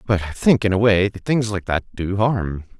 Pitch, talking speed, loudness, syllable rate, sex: 100 Hz, 235 wpm, -20 LUFS, 4.8 syllables/s, male